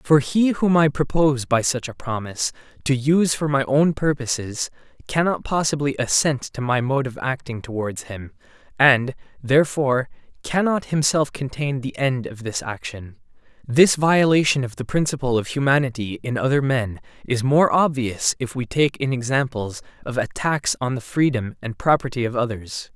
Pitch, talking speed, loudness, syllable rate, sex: 135 Hz, 160 wpm, -21 LUFS, 4.9 syllables/s, male